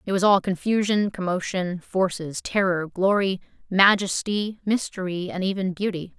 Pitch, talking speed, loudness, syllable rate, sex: 190 Hz, 125 wpm, -23 LUFS, 4.6 syllables/s, female